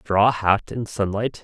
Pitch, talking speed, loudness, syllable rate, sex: 105 Hz, 170 wpm, -21 LUFS, 3.6 syllables/s, male